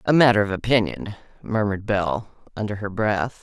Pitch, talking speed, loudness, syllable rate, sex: 105 Hz, 160 wpm, -22 LUFS, 5.7 syllables/s, female